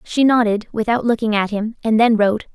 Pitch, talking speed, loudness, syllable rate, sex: 220 Hz, 210 wpm, -17 LUFS, 5.7 syllables/s, female